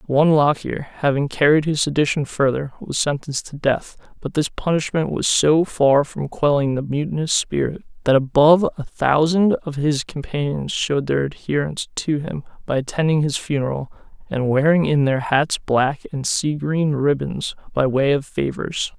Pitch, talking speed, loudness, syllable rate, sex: 145 Hz, 165 wpm, -20 LUFS, 4.8 syllables/s, male